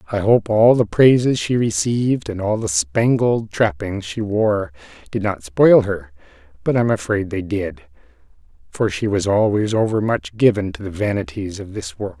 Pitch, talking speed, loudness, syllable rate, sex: 110 Hz, 180 wpm, -18 LUFS, 4.7 syllables/s, male